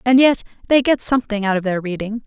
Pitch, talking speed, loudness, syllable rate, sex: 225 Hz, 240 wpm, -18 LUFS, 6.4 syllables/s, female